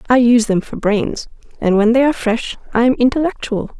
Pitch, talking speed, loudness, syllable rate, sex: 235 Hz, 205 wpm, -16 LUFS, 5.8 syllables/s, female